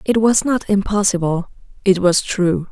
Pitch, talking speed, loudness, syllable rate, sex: 195 Hz, 130 wpm, -17 LUFS, 4.4 syllables/s, female